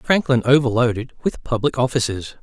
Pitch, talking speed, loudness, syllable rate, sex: 120 Hz, 125 wpm, -19 LUFS, 5.5 syllables/s, male